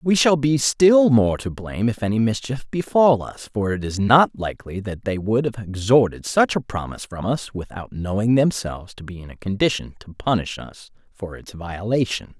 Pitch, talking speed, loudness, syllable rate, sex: 115 Hz, 200 wpm, -21 LUFS, 5.0 syllables/s, male